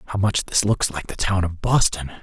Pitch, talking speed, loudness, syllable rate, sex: 95 Hz, 240 wpm, -21 LUFS, 4.8 syllables/s, male